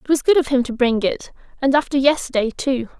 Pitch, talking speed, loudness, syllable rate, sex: 270 Hz, 240 wpm, -19 LUFS, 5.9 syllables/s, female